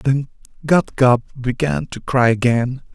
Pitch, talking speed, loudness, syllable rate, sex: 130 Hz, 145 wpm, -18 LUFS, 3.9 syllables/s, male